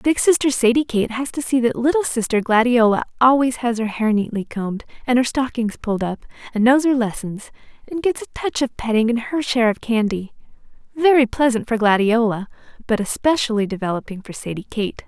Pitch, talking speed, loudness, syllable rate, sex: 240 Hz, 185 wpm, -19 LUFS, 5.7 syllables/s, female